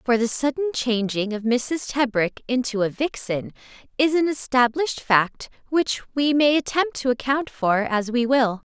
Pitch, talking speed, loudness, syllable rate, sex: 255 Hz, 165 wpm, -22 LUFS, 4.4 syllables/s, female